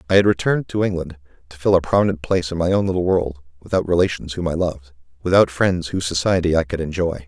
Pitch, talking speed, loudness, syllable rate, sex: 85 Hz, 225 wpm, -20 LUFS, 6.9 syllables/s, male